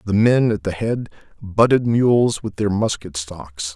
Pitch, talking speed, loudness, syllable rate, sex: 105 Hz, 175 wpm, -19 LUFS, 4.0 syllables/s, male